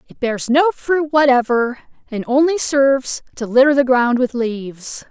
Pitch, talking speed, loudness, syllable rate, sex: 260 Hz, 165 wpm, -16 LUFS, 4.4 syllables/s, female